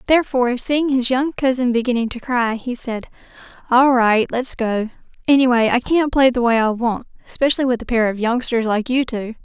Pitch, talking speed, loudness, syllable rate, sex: 245 Hz, 195 wpm, -18 LUFS, 5.4 syllables/s, female